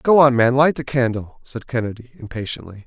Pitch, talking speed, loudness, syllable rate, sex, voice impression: 125 Hz, 190 wpm, -19 LUFS, 5.6 syllables/s, male, masculine, adult-like, tensed, powerful, soft, slightly muffled, fluent, cool, calm, friendly, wild, lively